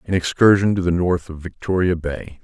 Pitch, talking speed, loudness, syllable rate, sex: 90 Hz, 195 wpm, -19 LUFS, 5.2 syllables/s, male